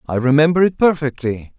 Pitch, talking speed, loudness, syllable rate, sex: 145 Hz, 150 wpm, -16 LUFS, 5.7 syllables/s, male